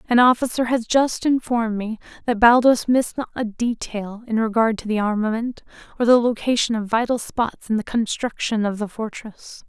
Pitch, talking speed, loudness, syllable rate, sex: 230 Hz, 180 wpm, -21 LUFS, 5.1 syllables/s, female